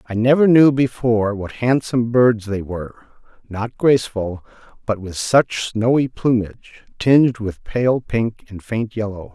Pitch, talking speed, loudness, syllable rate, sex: 115 Hz, 150 wpm, -18 LUFS, 4.4 syllables/s, male